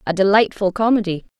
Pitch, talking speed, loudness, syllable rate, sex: 205 Hz, 130 wpm, -17 LUFS, 6.1 syllables/s, female